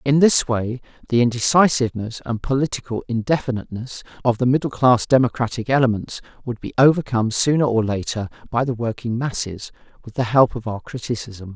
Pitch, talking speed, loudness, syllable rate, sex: 120 Hz, 155 wpm, -20 LUFS, 5.8 syllables/s, male